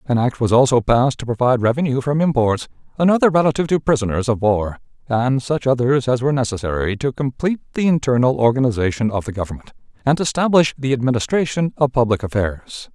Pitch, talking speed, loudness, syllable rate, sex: 125 Hz, 170 wpm, -18 LUFS, 6.3 syllables/s, male